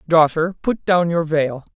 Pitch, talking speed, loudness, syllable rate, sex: 165 Hz, 170 wpm, -18 LUFS, 4.1 syllables/s, female